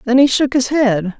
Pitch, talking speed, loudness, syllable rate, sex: 250 Hz, 250 wpm, -14 LUFS, 4.8 syllables/s, female